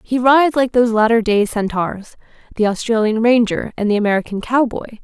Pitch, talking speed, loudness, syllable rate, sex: 225 Hz, 155 wpm, -16 LUFS, 5.6 syllables/s, female